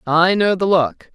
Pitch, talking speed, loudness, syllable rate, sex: 185 Hz, 210 wpm, -16 LUFS, 3.9 syllables/s, female